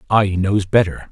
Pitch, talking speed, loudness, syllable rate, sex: 100 Hz, 160 wpm, -17 LUFS, 4.4 syllables/s, male